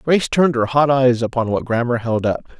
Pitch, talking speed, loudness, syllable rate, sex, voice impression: 125 Hz, 230 wpm, -17 LUFS, 5.9 syllables/s, male, masculine, middle-aged, relaxed, slightly weak, slightly muffled, nasal, intellectual, mature, friendly, wild, lively, strict